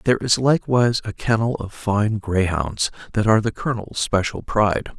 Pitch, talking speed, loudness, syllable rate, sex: 105 Hz, 170 wpm, -21 LUFS, 5.4 syllables/s, male